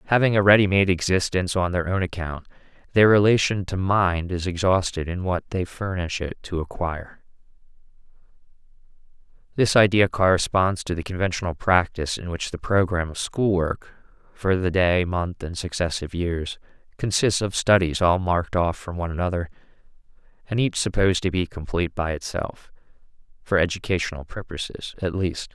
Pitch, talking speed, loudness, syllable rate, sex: 90 Hz, 150 wpm, -23 LUFS, 5.3 syllables/s, male